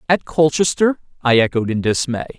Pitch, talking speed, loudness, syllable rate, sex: 140 Hz, 150 wpm, -17 LUFS, 5.3 syllables/s, male